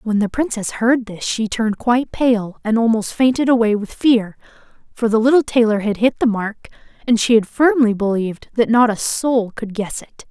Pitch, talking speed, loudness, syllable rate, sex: 225 Hz, 205 wpm, -17 LUFS, 5.1 syllables/s, female